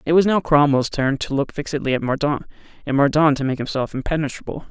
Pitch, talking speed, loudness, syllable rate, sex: 145 Hz, 205 wpm, -20 LUFS, 6.2 syllables/s, male